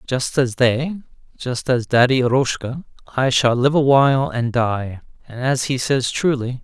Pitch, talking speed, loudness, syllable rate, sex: 125 Hz, 165 wpm, -18 LUFS, 4.4 syllables/s, male